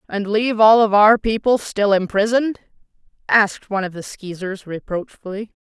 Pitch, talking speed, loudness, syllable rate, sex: 210 Hz, 150 wpm, -17 LUFS, 5.2 syllables/s, female